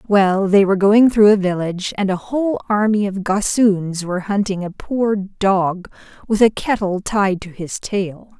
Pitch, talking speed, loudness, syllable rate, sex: 200 Hz, 180 wpm, -17 LUFS, 4.4 syllables/s, female